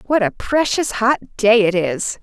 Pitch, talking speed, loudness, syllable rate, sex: 225 Hz, 190 wpm, -17 LUFS, 4.2 syllables/s, female